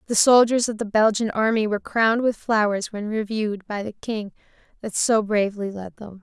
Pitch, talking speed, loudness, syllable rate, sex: 215 Hz, 195 wpm, -22 LUFS, 5.4 syllables/s, female